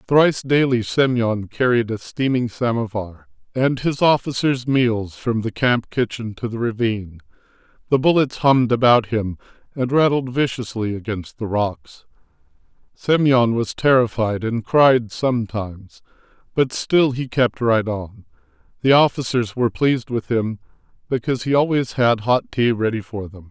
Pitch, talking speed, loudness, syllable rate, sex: 120 Hz, 145 wpm, -19 LUFS, 4.6 syllables/s, male